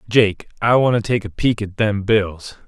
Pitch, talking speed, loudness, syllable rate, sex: 105 Hz, 200 wpm, -18 LUFS, 4.4 syllables/s, male